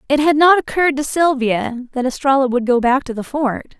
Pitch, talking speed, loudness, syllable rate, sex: 270 Hz, 220 wpm, -16 LUFS, 5.3 syllables/s, female